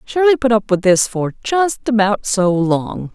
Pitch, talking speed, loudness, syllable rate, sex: 215 Hz, 190 wpm, -16 LUFS, 4.0 syllables/s, female